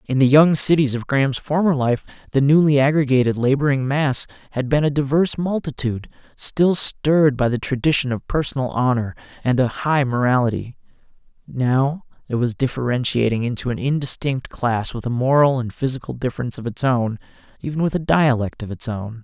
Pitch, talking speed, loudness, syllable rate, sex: 135 Hz, 165 wpm, -19 LUFS, 5.5 syllables/s, male